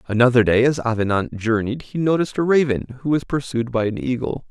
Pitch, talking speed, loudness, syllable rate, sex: 125 Hz, 200 wpm, -20 LUFS, 5.8 syllables/s, male